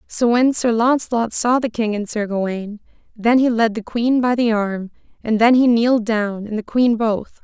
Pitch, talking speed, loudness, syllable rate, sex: 225 Hz, 220 wpm, -18 LUFS, 4.8 syllables/s, female